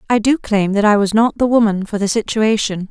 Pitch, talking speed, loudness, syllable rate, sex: 215 Hz, 250 wpm, -15 LUFS, 5.5 syllables/s, female